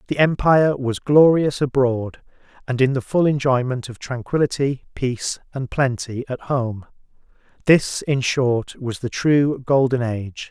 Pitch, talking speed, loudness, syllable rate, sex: 130 Hz, 145 wpm, -20 LUFS, 4.3 syllables/s, male